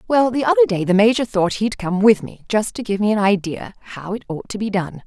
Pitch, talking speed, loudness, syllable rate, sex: 210 Hz, 275 wpm, -18 LUFS, 5.8 syllables/s, female